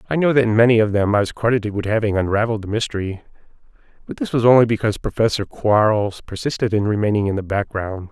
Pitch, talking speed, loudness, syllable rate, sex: 105 Hz, 205 wpm, -19 LUFS, 6.8 syllables/s, male